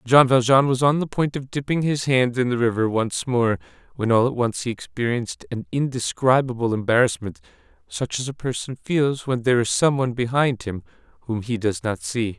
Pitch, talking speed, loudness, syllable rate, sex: 125 Hz, 200 wpm, -22 LUFS, 5.3 syllables/s, male